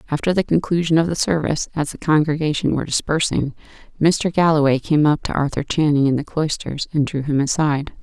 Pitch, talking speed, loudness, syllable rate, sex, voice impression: 150 Hz, 185 wpm, -19 LUFS, 6.0 syllables/s, female, feminine, middle-aged, muffled, very calm, very elegant